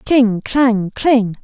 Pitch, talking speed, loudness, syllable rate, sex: 230 Hz, 125 wpm, -15 LUFS, 2.4 syllables/s, female